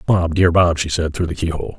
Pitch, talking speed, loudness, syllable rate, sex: 85 Hz, 270 wpm, -18 LUFS, 6.1 syllables/s, male